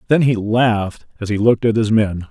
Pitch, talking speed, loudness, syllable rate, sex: 110 Hz, 235 wpm, -16 LUFS, 5.6 syllables/s, male